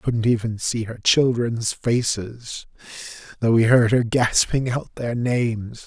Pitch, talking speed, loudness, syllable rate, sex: 115 Hz, 155 wpm, -21 LUFS, 4.0 syllables/s, male